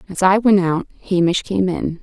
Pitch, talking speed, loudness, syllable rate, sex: 185 Hz, 210 wpm, -17 LUFS, 4.9 syllables/s, female